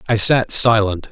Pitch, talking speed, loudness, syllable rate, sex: 110 Hz, 160 wpm, -14 LUFS, 4.3 syllables/s, male